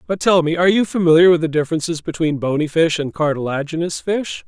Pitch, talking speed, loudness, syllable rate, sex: 165 Hz, 200 wpm, -17 LUFS, 6.2 syllables/s, male